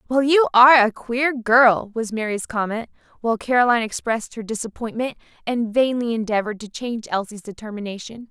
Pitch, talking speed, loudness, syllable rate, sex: 230 Hz, 150 wpm, -20 LUFS, 5.8 syllables/s, female